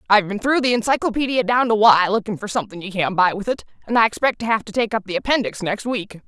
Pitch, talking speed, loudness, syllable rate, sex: 215 Hz, 270 wpm, -19 LUFS, 6.8 syllables/s, female